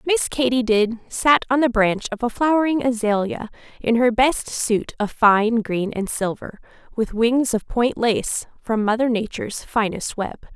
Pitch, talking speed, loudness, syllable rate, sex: 235 Hz, 170 wpm, -20 LUFS, 4.3 syllables/s, female